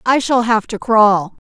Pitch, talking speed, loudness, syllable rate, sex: 225 Hz, 200 wpm, -14 LUFS, 3.9 syllables/s, female